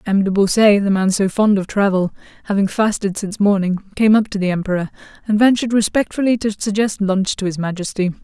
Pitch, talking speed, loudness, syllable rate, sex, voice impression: 200 Hz, 195 wpm, -17 LUFS, 6.0 syllables/s, female, feminine, adult-like, slightly muffled, fluent, slightly sincere, calm, reassuring, slightly unique